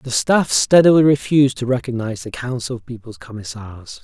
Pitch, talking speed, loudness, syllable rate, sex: 125 Hz, 165 wpm, -16 LUFS, 5.5 syllables/s, male